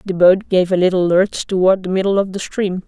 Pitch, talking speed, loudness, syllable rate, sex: 185 Hz, 250 wpm, -16 LUFS, 5.4 syllables/s, female